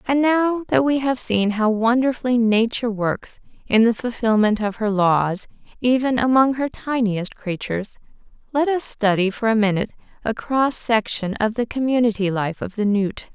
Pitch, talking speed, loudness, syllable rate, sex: 225 Hz, 165 wpm, -20 LUFS, 4.8 syllables/s, female